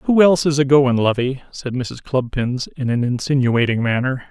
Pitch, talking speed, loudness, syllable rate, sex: 130 Hz, 180 wpm, -18 LUFS, 4.9 syllables/s, male